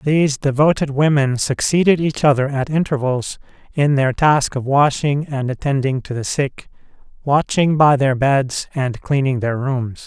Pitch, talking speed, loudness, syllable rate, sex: 140 Hz, 155 wpm, -17 LUFS, 4.4 syllables/s, male